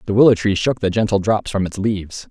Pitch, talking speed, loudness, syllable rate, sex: 100 Hz, 260 wpm, -18 LUFS, 6.1 syllables/s, male